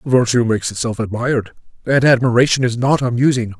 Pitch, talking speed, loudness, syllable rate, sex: 120 Hz, 150 wpm, -16 LUFS, 6.0 syllables/s, male